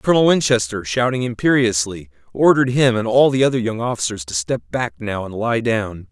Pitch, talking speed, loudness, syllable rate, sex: 115 Hz, 185 wpm, -18 LUFS, 5.6 syllables/s, male